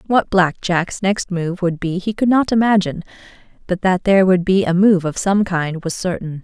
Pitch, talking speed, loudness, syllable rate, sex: 185 Hz, 215 wpm, -17 LUFS, 5.0 syllables/s, female